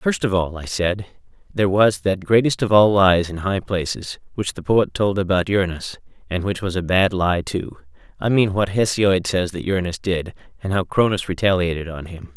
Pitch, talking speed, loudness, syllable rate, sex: 95 Hz, 200 wpm, -20 LUFS, 5.0 syllables/s, male